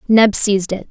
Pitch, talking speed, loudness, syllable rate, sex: 205 Hz, 200 wpm, -14 LUFS, 5.3 syllables/s, female